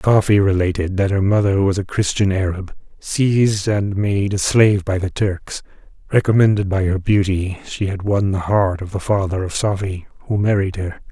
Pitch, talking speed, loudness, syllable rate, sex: 100 Hz, 185 wpm, -18 LUFS, 4.9 syllables/s, male